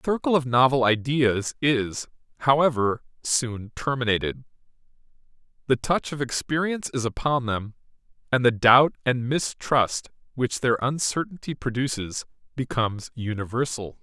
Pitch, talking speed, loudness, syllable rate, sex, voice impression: 125 Hz, 115 wpm, -24 LUFS, 4.7 syllables/s, male, masculine, adult-like, tensed, powerful, slightly bright, slightly fluent, slightly halting, slightly intellectual, sincere, calm, friendly, wild, slightly lively, kind, modest